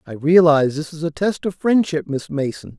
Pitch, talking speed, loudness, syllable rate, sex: 160 Hz, 215 wpm, -18 LUFS, 5.2 syllables/s, male